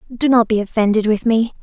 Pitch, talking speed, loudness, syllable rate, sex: 225 Hz, 220 wpm, -16 LUFS, 5.9 syllables/s, female